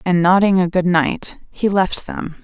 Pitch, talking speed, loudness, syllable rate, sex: 180 Hz, 200 wpm, -17 LUFS, 4.0 syllables/s, female